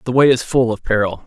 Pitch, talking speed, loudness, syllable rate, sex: 120 Hz, 285 wpm, -16 LUFS, 6.2 syllables/s, male